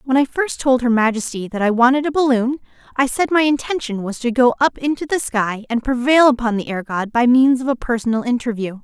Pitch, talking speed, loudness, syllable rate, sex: 250 Hz, 230 wpm, -17 LUFS, 5.7 syllables/s, female